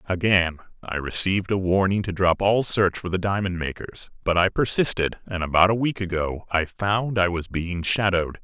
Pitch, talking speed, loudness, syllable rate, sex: 95 Hz, 190 wpm, -23 LUFS, 5.0 syllables/s, male